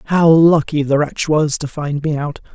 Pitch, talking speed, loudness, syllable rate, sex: 150 Hz, 210 wpm, -15 LUFS, 4.5 syllables/s, male